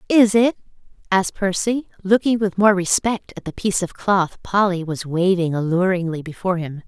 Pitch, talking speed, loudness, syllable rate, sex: 190 Hz, 165 wpm, -19 LUFS, 5.2 syllables/s, female